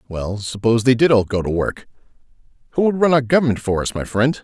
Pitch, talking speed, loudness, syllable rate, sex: 120 Hz, 230 wpm, -18 LUFS, 6.2 syllables/s, male